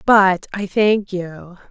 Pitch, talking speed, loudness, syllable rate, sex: 190 Hz, 140 wpm, -18 LUFS, 2.8 syllables/s, female